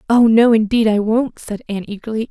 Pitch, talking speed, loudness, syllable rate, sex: 220 Hz, 210 wpm, -16 LUFS, 5.9 syllables/s, female